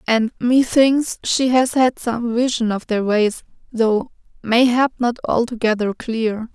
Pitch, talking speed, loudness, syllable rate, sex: 235 Hz, 140 wpm, -18 LUFS, 3.8 syllables/s, female